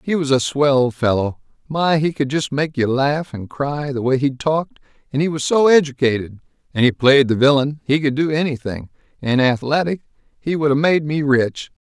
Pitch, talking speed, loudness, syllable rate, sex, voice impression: 140 Hz, 185 wpm, -18 LUFS, 5.1 syllables/s, male, masculine, adult-like, tensed, powerful, bright, clear, slightly halting, mature, friendly, wild, lively, slightly intense